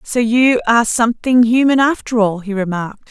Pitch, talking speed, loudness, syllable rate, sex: 230 Hz, 175 wpm, -14 LUFS, 5.5 syllables/s, female